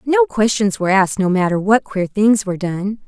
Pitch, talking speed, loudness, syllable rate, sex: 200 Hz, 215 wpm, -16 LUFS, 5.5 syllables/s, female